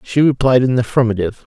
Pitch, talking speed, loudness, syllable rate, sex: 120 Hz, 195 wpm, -15 LUFS, 7.3 syllables/s, male